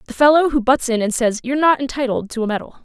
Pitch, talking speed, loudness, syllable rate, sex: 255 Hz, 275 wpm, -17 LUFS, 6.9 syllables/s, female